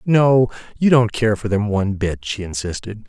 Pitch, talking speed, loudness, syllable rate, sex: 110 Hz, 195 wpm, -18 LUFS, 4.8 syllables/s, male